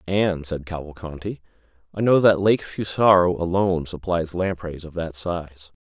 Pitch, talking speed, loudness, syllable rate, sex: 90 Hz, 145 wpm, -22 LUFS, 4.6 syllables/s, male